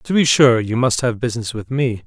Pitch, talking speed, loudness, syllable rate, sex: 125 Hz, 260 wpm, -17 LUFS, 5.5 syllables/s, male